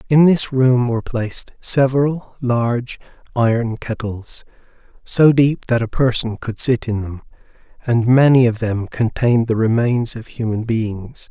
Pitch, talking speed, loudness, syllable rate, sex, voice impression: 120 Hz, 150 wpm, -17 LUFS, 4.4 syllables/s, male, masculine, very adult-like, relaxed, weak, slightly raspy, sincere, calm, kind